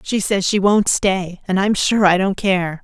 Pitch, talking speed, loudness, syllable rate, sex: 190 Hz, 235 wpm, -17 LUFS, 4.1 syllables/s, female